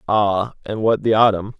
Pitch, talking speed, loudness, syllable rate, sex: 105 Hz, 190 wpm, -18 LUFS, 4.6 syllables/s, male